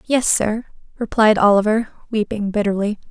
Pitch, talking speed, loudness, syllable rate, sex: 215 Hz, 115 wpm, -18 LUFS, 5.0 syllables/s, female